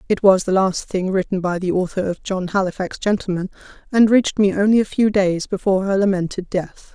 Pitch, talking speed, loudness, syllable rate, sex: 190 Hz, 205 wpm, -19 LUFS, 5.7 syllables/s, female